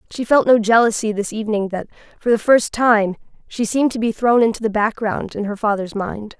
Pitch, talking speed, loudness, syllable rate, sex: 220 Hz, 215 wpm, -18 LUFS, 5.6 syllables/s, female